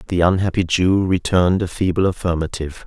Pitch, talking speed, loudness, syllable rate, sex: 90 Hz, 145 wpm, -18 LUFS, 6.0 syllables/s, male